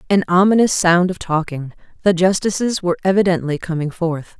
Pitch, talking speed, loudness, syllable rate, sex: 185 Hz, 150 wpm, -17 LUFS, 5.6 syllables/s, female